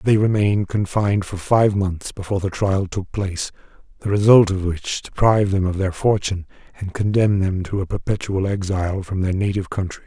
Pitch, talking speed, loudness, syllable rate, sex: 95 Hz, 185 wpm, -20 LUFS, 5.7 syllables/s, male